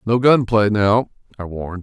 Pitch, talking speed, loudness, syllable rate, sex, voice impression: 105 Hz, 195 wpm, -16 LUFS, 4.7 syllables/s, male, masculine, adult-like, thick, tensed, slightly powerful, soft, slightly halting, cool, calm, friendly, reassuring, wild, kind, slightly modest